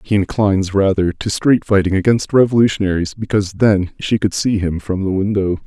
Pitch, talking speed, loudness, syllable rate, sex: 100 Hz, 170 wpm, -16 LUFS, 5.5 syllables/s, male